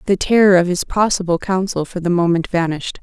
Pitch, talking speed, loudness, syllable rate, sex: 180 Hz, 200 wpm, -16 LUFS, 6.0 syllables/s, female